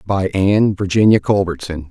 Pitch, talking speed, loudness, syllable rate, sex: 95 Hz, 125 wpm, -15 LUFS, 5.1 syllables/s, male